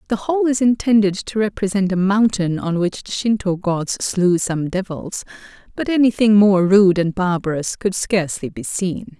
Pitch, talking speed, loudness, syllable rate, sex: 200 Hz, 170 wpm, -18 LUFS, 4.7 syllables/s, female